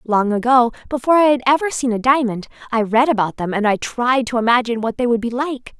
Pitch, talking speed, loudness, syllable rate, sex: 245 Hz, 240 wpm, -17 LUFS, 6.1 syllables/s, female